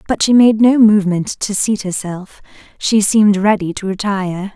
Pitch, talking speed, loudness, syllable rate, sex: 200 Hz, 170 wpm, -14 LUFS, 5.0 syllables/s, female